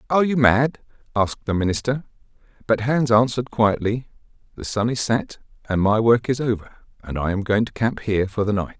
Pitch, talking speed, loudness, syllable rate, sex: 115 Hz, 200 wpm, -21 LUFS, 5.8 syllables/s, male